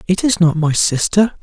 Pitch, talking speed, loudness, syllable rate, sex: 180 Hz, 210 wpm, -15 LUFS, 4.8 syllables/s, male